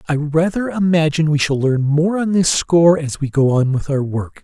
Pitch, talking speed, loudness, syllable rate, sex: 155 Hz, 230 wpm, -16 LUFS, 5.2 syllables/s, male